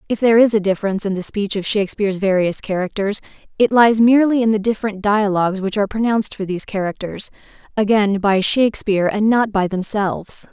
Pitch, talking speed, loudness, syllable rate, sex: 205 Hz, 175 wpm, -17 LUFS, 6.2 syllables/s, female